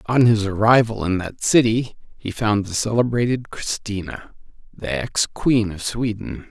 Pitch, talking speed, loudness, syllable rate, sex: 110 Hz, 150 wpm, -20 LUFS, 4.3 syllables/s, male